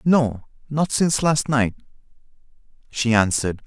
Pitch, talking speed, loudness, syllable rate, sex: 130 Hz, 100 wpm, -20 LUFS, 4.6 syllables/s, male